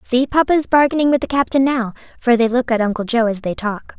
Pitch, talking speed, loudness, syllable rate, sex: 245 Hz, 255 wpm, -17 LUFS, 6.1 syllables/s, female